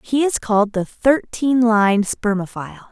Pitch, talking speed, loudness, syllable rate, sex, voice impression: 225 Hz, 145 wpm, -18 LUFS, 4.9 syllables/s, female, very feminine, very adult-like, thin, slightly tensed, slightly powerful, bright, slightly soft, clear, fluent, cute, very intellectual, very refreshing, sincere, calm, very friendly, very reassuring, very unique, very elegant, slightly wild, sweet, very lively, kind, slightly intense